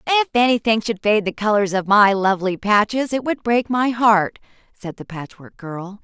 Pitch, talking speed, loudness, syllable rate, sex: 210 Hz, 190 wpm, -18 LUFS, 4.9 syllables/s, female